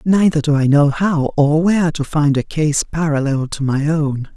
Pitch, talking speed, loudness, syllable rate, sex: 150 Hz, 205 wpm, -16 LUFS, 4.6 syllables/s, female